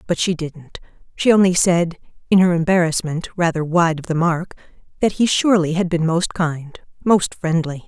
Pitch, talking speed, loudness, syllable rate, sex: 170 Hz, 160 wpm, -18 LUFS, 4.9 syllables/s, female